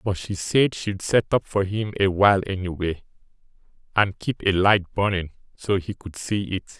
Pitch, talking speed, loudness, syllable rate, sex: 100 Hz, 185 wpm, -23 LUFS, 4.6 syllables/s, male